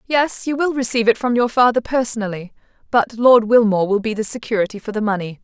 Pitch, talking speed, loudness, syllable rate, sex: 230 Hz, 210 wpm, -17 LUFS, 6.3 syllables/s, female